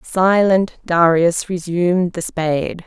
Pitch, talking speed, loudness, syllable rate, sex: 175 Hz, 105 wpm, -17 LUFS, 3.9 syllables/s, female